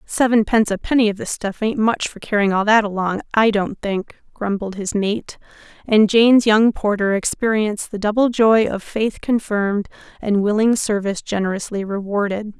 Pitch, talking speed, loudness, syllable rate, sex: 210 Hz, 165 wpm, -18 LUFS, 5.1 syllables/s, female